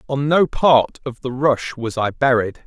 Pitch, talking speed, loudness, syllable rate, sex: 130 Hz, 205 wpm, -18 LUFS, 4.1 syllables/s, male